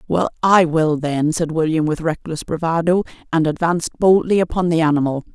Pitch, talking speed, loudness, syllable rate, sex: 165 Hz, 170 wpm, -18 LUFS, 5.5 syllables/s, female